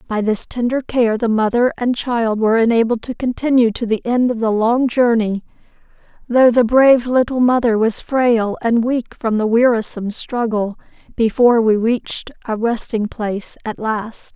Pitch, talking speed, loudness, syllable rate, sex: 230 Hz, 165 wpm, -17 LUFS, 4.7 syllables/s, female